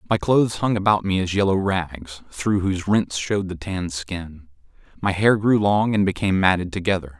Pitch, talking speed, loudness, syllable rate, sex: 95 Hz, 190 wpm, -21 LUFS, 5.3 syllables/s, male